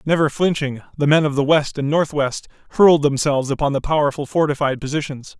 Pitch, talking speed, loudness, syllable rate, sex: 145 Hz, 180 wpm, -18 LUFS, 6.0 syllables/s, male